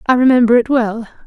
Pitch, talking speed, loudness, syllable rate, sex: 240 Hz, 190 wpm, -13 LUFS, 6.1 syllables/s, female